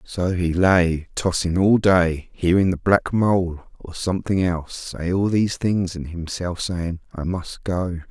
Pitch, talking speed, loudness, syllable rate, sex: 90 Hz, 170 wpm, -21 LUFS, 4.0 syllables/s, male